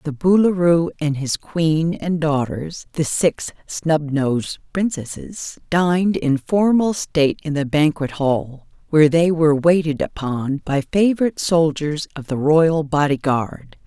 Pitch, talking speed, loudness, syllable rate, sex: 155 Hz, 125 wpm, -19 LUFS, 4.1 syllables/s, female